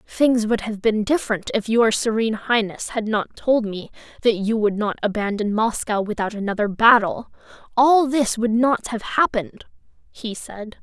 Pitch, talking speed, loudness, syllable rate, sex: 225 Hz, 165 wpm, -20 LUFS, 4.7 syllables/s, female